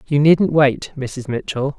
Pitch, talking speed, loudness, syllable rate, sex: 140 Hz, 170 wpm, -17 LUFS, 3.7 syllables/s, male